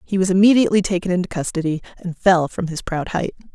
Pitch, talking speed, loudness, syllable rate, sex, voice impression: 180 Hz, 205 wpm, -19 LUFS, 6.4 syllables/s, female, very feminine, adult-like, slightly middle-aged, thin, slightly tensed, slightly powerful, bright, slightly hard, clear, fluent, slightly raspy, slightly cute, cool, intellectual, refreshing, slightly sincere, calm, friendly, slightly reassuring, unique, slightly elegant, strict